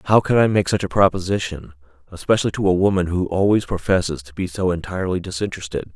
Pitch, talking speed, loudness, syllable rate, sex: 90 Hz, 190 wpm, -20 LUFS, 6.8 syllables/s, male